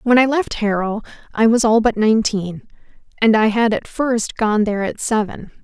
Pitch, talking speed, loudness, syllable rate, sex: 220 Hz, 190 wpm, -17 LUFS, 5.0 syllables/s, female